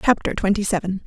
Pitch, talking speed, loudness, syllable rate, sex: 200 Hz, 170 wpm, -21 LUFS, 6.4 syllables/s, female